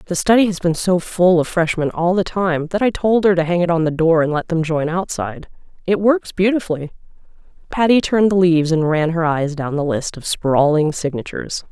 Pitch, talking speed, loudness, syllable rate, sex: 170 Hz, 220 wpm, -17 LUFS, 5.4 syllables/s, female